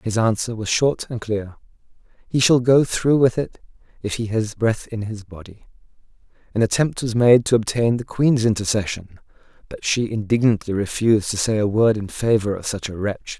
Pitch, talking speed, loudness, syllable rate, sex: 110 Hz, 190 wpm, -20 LUFS, 5.1 syllables/s, male